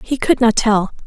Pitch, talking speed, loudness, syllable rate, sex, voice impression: 230 Hz, 225 wpm, -15 LUFS, 4.6 syllables/s, female, feminine, adult-like, tensed, powerful, clear, fluent, intellectual, calm, reassuring, elegant, lively, slightly modest